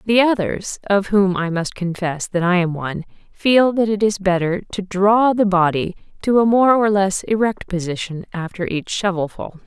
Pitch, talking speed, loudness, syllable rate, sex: 195 Hz, 185 wpm, -18 LUFS, 4.7 syllables/s, female